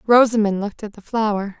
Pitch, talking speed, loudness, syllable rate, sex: 210 Hz, 190 wpm, -19 LUFS, 6.2 syllables/s, female